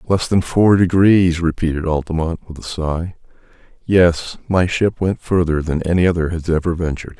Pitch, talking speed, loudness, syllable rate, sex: 85 Hz, 165 wpm, -17 LUFS, 5.0 syllables/s, male